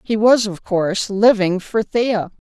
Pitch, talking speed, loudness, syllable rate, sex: 210 Hz, 170 wpm, -17 LUFS, 4.0 syllables/s, female